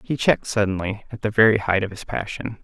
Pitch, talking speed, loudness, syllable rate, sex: 105 Hz, 225 wpm, -21 LUFS, 6.1 syllables/s, male